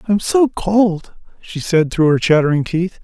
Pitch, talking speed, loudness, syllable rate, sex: 180 Hz, 180 wpm, -15 LUFS, 4.2 syllables/s, male